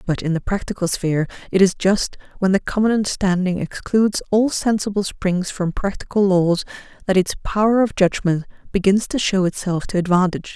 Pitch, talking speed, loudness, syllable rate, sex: 190 Hz, 170 wpm, -19 LUFS, 5.6 syllables/s, female